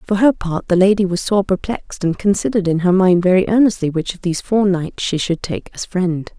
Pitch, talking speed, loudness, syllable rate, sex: 185 Hz, 235 wpm, -17 LUFS, 5.6 syllables/s, female